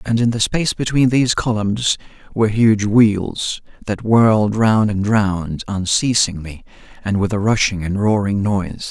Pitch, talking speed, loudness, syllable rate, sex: 105 Hz, 155 wpm, -17 LUFS, 4.5 syllables/s, male